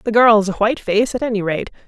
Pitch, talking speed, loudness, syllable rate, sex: 215 Hz, 255 wpm, -17 LUFS, 6.3 syllables/s, female